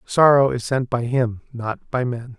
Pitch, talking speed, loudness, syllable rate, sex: 125 Hz, 200 wpm, -20 LUFS, 4.1 syllables/s, male